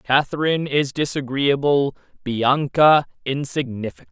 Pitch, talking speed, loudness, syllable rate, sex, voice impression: 140 Hz, 75 wpm, -20 LUFS, 4.4 syllables/s, male, masculine, adult-like, middle-aged, slightly thick, tensed, slightly powerful, slightly bright, slightly hard, clear, fluent, slightly cool, very intellectual, sincere, calm, slightly mature, slightly friendly, slightly reassuring, slightly unique, elegant, slightly sweet, slightly lively, slightly kind, slightly modest